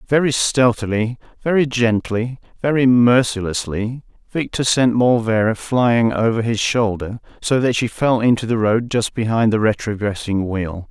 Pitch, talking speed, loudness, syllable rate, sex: 115 Hz, 140 wpm, -18 LUFS, 4.5 syllables/s, male